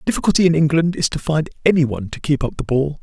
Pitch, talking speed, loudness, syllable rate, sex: 150 Hz, 280 wpm, -18 LUFS, 7.3 syllables/s, male